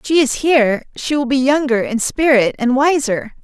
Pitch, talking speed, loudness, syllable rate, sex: 265 Hz, 210 wpm, -15 LUFS, 5.1 syllables/s, female